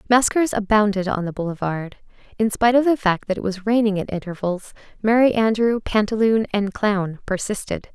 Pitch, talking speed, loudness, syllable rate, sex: 210 Hz, 165 wpm, -20 LUFS, 5.2 syllables/s, female